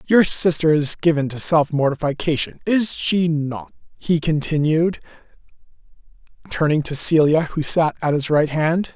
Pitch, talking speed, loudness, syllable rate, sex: 155 Hz, 140 wpm, -18 LUFS, 4.5 syllables/s, male